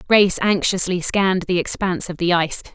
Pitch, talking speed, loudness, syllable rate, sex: 180 Hz, 175 wpm, -19 LUFS, 6.2 syllables/s, female